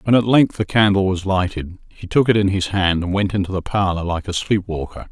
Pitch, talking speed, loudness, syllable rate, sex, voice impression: 95 Hz, 245 wpm, -18 LUFS, 5.6 syllables/s, male, masculine, middle-aged, thick, slightly tensed, powerful, hard, raspy, cool, intellectual, mature, reassuring, wild, lively, strict